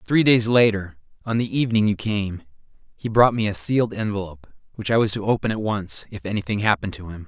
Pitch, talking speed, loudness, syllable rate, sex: 105 Hz, 215 wpm, -21 LUFS, 6.2 syllables/s, male